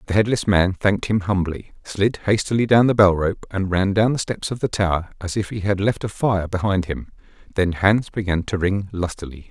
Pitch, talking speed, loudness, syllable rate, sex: 100 Hz, 220 wpm, -20 LUFS, 5.2 syllables/s, male